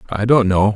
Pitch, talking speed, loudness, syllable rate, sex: 105 Hz, 240 wpm, -15 LUFS, 5.9 syllables/s, male